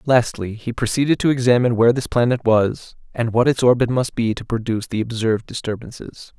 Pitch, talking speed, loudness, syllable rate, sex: 120 Hz, 190 wpm, -19 LUFS, 6.0 syllables/s, male